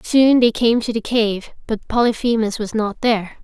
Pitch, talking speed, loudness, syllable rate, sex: 225 Hz, 190 wpm, -18 LUFS, 4.7 syllables/s, female